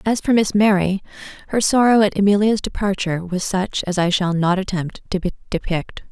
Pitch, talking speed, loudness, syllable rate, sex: 195 Hz, 175 wpm, -19 LUFS, 5.2 syllables/s, female